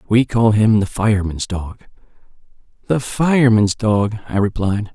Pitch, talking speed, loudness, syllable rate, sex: 110 Hz, 135 wpm, -17 LUFS, 4.4 syllables/s, male